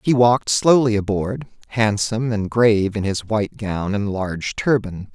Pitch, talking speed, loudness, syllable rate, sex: 110 Hz, 165 wpm, -19 LUFS, 4.8 syllables/s, male